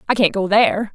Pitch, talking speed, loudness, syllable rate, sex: 200 Hz, 255 wpm, -16 LUFS, 6.5 syllables/s, female